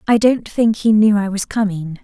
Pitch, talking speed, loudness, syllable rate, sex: 210 Hz, 235 wpm, -16 LUFS, 4.8 syllables/s, female